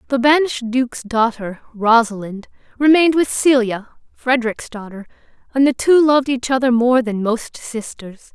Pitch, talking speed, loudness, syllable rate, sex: 245 Hz, 145 wpm, -16 LUFS, 4.9 syllables/s, female